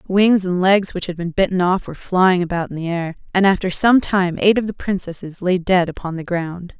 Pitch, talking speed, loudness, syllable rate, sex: 180 Hz, 240 wpm, -18 LUFS, 5.3 syllables/s, female